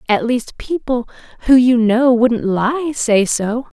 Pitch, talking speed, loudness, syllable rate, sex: 240 Hz, 160 wpm, -15 LUFS, 3.5 syllables/s, female